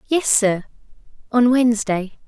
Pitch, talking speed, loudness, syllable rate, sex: 230 Hz, 105 wpm, -18 LUFS, 4.2 syllables/s, female